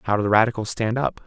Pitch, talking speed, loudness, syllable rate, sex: 110 Hz, 285 wpm, -21 LUFS, 7.2 syllables/s, male